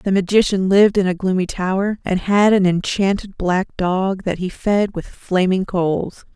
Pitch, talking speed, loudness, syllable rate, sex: 190 Hz, 180 wpm, -18 LUFS, 4.6 syllables/s, female